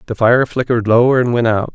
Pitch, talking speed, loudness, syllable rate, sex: 120 Hz, 240 wpm, -14 LUFS, 6.4 syllables/s, male